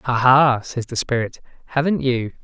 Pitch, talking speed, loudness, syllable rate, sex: 130 Hz, 175 wpm, -19 LUFS, 4.5 syllables/s, male